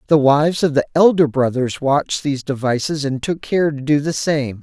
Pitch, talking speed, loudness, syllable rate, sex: 145 Hz, 205 wpm, -17 LUFS, 5.3 syllables/s, male